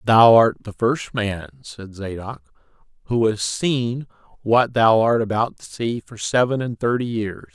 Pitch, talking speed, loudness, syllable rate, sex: 115 Hz, 165 wpm, -20 LUFS, 4.0 syllables/s, male